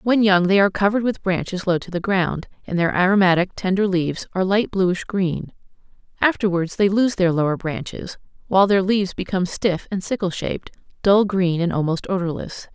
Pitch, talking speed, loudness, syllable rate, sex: 190 Hz, 185 wpm, -20 LUFS, 5.6 syllables/s, female